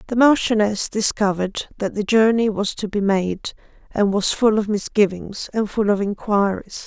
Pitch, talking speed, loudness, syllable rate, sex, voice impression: 205 Hz, 165 wpm, -20 LUFS, 4.7 syllables/s, female, feminine, adult-like, slightly calm, friendly, slightly sweet, slightly kind